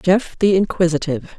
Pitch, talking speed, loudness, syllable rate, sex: 175 Hz, 130 wpm, -18 LUFS, 5.3 syllables/s, female